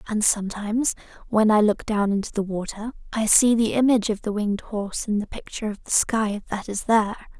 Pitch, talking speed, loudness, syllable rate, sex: 215 Hz, 210 wpm, -23 LUFS, 6.0 syllables/s, female